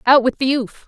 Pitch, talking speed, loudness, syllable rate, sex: 255 Hz, 275 wpm, -17 LUFS, 5.3 syllables/s, female